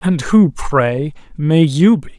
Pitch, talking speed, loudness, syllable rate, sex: 160 Hz, 165 wpm, -14 LUFS, 3.3 syllables/s, male